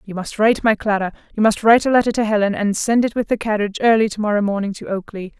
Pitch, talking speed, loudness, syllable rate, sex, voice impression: 210 Hz, 255 wpm, -18 LUFS, 7.0 syllables/s, female, feminine, very adult-like, slightly fluent, intellectual, elegant